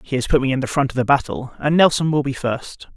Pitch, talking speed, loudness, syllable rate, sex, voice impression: 135 Hz, 305 wpm, -19 LUFS, 6.2 syllables/s, male, masculine, very adult-like, slightly thick, sincere, slightly calm, slightly unique